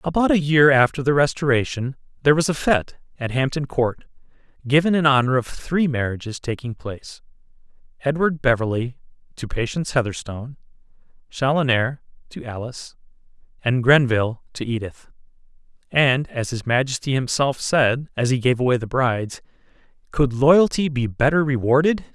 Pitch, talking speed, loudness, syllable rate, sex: 135 Hz, 135 wpm, -20 LUFS, 5.3 syllables/s, male